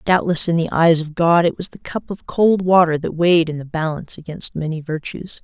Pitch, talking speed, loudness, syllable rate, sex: 165 Hz, 230 wpm, -18 LUFS, 5.4 syllables/s, female